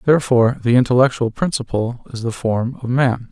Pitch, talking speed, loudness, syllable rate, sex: 125 Hz, 165 wpm, -18 LUFS, 5.8 syllables/s, male